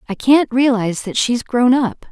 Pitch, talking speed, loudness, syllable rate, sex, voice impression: 240 Hz, 200 wpm, -16 LUFS, 4.7 syllables/s, female, feminine, adult-like, tensed, bright, clear, fluent, intellectual, calm, friendly, reassuring, elegant, lively, slightly kind